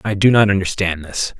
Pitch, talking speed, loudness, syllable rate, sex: 95 Hz, 215 wpm, -16 LUFS, 5.5 syllables/s, male